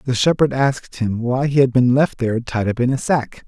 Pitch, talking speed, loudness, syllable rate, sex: 125 Hz, 260 wpm, -18 LUFS, 5.3 syllables/s, male